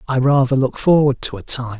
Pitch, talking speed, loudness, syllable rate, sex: 130 Hz, 235 wpm, -16 LUFS, 5.5 syllables/s, male